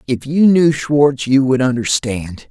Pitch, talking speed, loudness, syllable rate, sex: 135 Hz, 170 wpm, -14 LUFS, 3.8 syllables/s, male